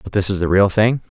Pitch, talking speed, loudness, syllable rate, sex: 100 Hz, 305 wpm, -16 LUFS, 6.0 syllables/s, male